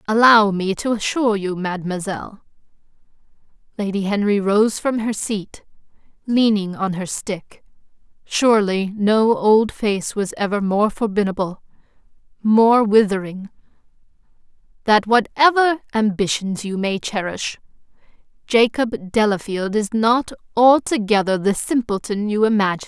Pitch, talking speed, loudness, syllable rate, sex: 210 Hz, 100 wpm, -19 LUFS, 4.5 syllables/s, female